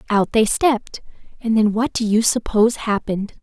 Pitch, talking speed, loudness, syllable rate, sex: 220 Hz, 175 wpm, -18 LUFS, 5.4 syllables/s, female